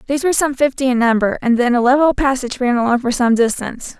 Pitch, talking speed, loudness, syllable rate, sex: 255 Hz, 240 wpm, -16 LUFS, 6.9 syllables/s, female